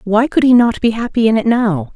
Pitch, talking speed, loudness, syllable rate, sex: 220 Hz, 275 wpm, -13 LUFS, 5.4 syllables/s, female